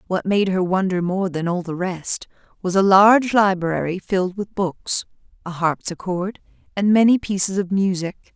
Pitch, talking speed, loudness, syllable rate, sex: 190 Hz, 165 wpm, -20 LUFS, 4.7 syllables/s, female